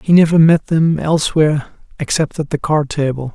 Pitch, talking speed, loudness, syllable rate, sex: 155 Hz, 180 wpm, -15 LUFS, 5.4 syllables/s, male